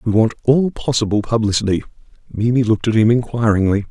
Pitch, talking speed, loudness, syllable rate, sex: 110 Hz, 155 wpm, -17 LUFS, 6.2 syllables/s, male